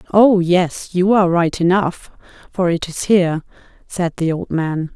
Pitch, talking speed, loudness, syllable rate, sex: 175 Hz, 170 wpm, -17 LUFS, 4.4 syllables/s, female